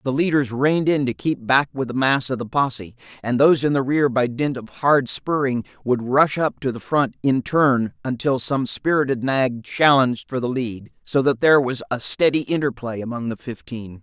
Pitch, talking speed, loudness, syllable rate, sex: 130 Hz, 210 wpm, -20 LUFS, 5.0 syllables/s, male